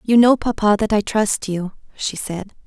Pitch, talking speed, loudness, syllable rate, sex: 210 Hz, 205 wpm, -19 LUFS, 4.5 syllables/s, female